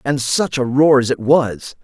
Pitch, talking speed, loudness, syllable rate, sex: 130 Hz, 230 wpm, -16 LUFS, 4.1 syllables/s, male